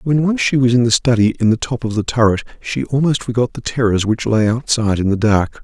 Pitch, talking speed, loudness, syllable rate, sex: 115 Hz, 255 wpm, -16 LUFS, 5.8 syllables/s, male